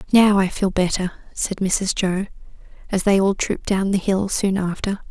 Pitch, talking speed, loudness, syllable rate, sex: 195 Hz, 190 wpm, -20 LUFS, 4.6 syllables/s, female